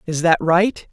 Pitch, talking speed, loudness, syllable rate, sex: 175 Hz, 195 wpm, -17 LUFS, 4.1 syllables/s, male